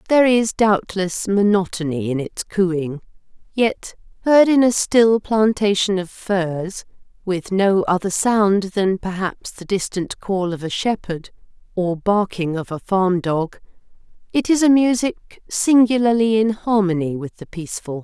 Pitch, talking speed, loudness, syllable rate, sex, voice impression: 195 Hz, 145 wpm, -19 LUFS, 4.2 syllables/s, female, feminine, middle-aged, tensed, slightly powerful, muffled, raspy, calm, friendly, elegant, lively